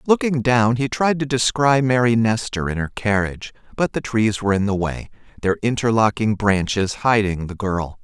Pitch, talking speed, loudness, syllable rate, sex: 110 Hz, 180 wpm, -19 LUFS, 4.9 syllables/s, male